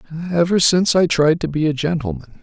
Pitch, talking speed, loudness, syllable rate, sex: 155 Hz, 200 wpm, -17 LUFS, 6.9 syllables/s, male